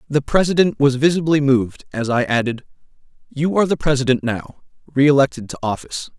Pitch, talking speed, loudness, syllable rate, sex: 140 Hz, 155 wpm, -18 LUFS, 5.8 syllables/s, male